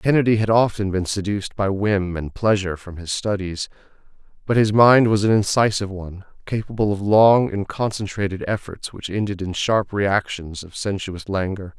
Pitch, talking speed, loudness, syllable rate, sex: 100 Hz, 170 wpm, -20 LUFS, 5.1 syllables/s, male